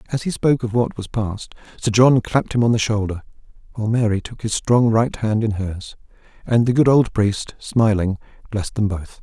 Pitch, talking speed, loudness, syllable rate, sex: 110 Hz, 210 wpm, -19 LUFS, 5.4 syllables/s, male